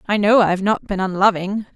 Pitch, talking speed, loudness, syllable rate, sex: 200 Hz, 205 wpm, -17 LUFS, 5.9 syllables/s, female